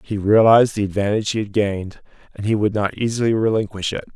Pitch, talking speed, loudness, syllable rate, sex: 105 Hz, 200 wpm, -19 LUFS, 6.6 syllables/s, male